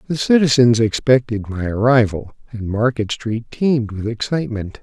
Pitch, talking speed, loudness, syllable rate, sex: 120 Hz, 135 wpm, -17 LUFS, 4.9 syllables/s, male